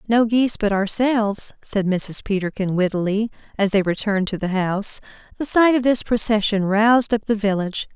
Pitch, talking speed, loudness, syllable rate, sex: 210 Hz, 175 wpm, -20 LUFS, 5.5 syllables/s, female